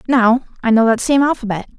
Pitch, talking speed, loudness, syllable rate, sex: 240 Hz, 200 wpm, -15 LUFS, 5.9 syllables/s, female